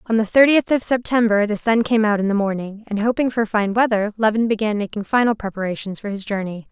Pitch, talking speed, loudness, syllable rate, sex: 215 Hz, 225 wpm, -19 LUFS, 6.0 syllables/s, female